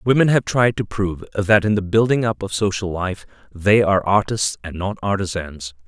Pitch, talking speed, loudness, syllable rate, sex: 100 Hz, 195 wpm, -19 LUFS, 5.2 syllables/s, male